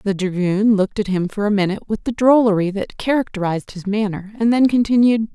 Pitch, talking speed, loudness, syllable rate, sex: 210 Hz, 200 wpm, -18 LUFS, 6.0 syllables/s, female